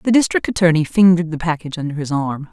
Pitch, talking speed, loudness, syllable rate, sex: 165 Hz, 215 wpm, -17 LUFS, 7.1 syllables/s, female